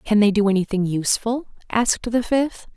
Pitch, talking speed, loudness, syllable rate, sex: 220 Hz, 175 wpm, -21 LUFS, 5.5 syllables/s, female